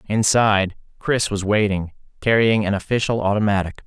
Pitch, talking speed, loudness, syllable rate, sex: 105 Hz, 125 wpm, -19 LUFS, 5.5 syllables/s, male